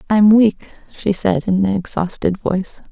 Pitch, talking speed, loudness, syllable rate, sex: 195 Hz, 165 wpm, -17 LUFS, 4.5 syllables/s, female